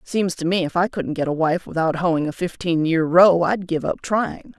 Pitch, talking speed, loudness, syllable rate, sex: 170 Hz, 250 wpm, -20 LUFS, 4.7 syllables/s, female